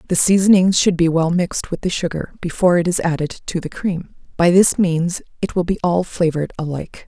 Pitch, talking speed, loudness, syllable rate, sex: 175 Hz, 210 wpm, -18 LUFS, 5.8 syllables/s, female